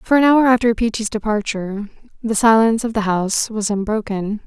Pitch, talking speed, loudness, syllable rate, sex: 220 Hz, 175 wpm, -17 LUFS, 5.7 syllables/s, female